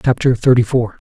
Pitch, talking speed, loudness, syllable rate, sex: 120 Hz, 170 wpm, -15 LUFS, 5.5 syllables/s, male